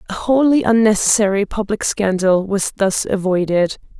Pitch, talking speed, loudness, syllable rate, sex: 205 Hz, 120 wpm, -16 LUFS, 4.8 syllables/s, female